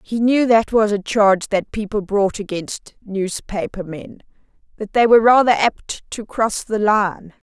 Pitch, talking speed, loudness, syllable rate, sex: 210 Hz, 160 wpm, -18 LUFS, 4.2 syllables/s, female